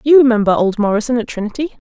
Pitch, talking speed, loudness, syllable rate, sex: 235 Hz, 190 wpm, -15 LUFS, 7.0 syllables/s, female